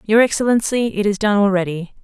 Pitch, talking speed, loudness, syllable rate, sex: 205 Hz, 175 wpm, -17 LUFS, 6.0 syllables/s, female